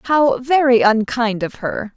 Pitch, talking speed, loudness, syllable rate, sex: 240 Hz, 155 wpm, -16 LUFS, 3.7 syllables/s, female